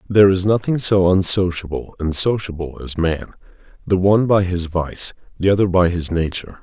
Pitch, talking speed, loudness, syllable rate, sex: 90 Hz, 170 wpm, -18 LUFS, 5.3 syllables/s, male